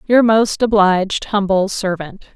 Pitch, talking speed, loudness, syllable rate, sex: 200 Hz, 125 wpm, -15 LUFS, 4.3 syllables/s, female